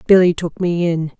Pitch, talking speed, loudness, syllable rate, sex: 170 Hz, 200 wpm, -17 LUFS, 5.1 syllables/s, female